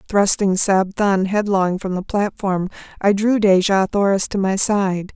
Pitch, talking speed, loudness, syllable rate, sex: 195 Hz, 165 wpm, -18 LUFS, 4.2 syllables/s, female